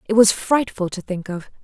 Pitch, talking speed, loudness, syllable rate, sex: 205 Hz, 220 wpm, -20 LUFS, 4.9 syllables/s, female